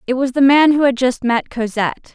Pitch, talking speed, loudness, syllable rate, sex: 260 Hz, 250 wpm, -15 LUFS, 5.5 syllables/s, female